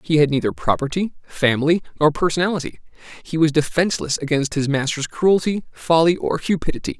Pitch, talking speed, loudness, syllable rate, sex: 160 Hz, 145 wpm, -20 LUFS, 5.9 syllables/s, male